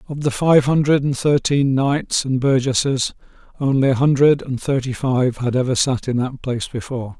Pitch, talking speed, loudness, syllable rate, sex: 135 Hz, 185 wpm, -18 LUFS, 5.0 syllables/s, male